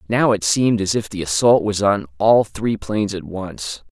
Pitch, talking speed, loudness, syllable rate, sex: 100 Hz, 215 wpm, -18 LUFS, 4.8 syllables/s, male